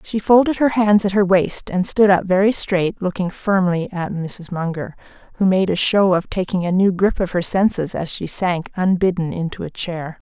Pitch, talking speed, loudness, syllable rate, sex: 185 Hz, 210 wpm, -18 LUFS, 4.8 syllables/s, female